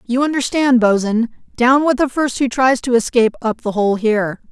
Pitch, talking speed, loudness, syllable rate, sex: 245 Hz, 200 wpm, -16 LUFS, 5.0 syllables/s, female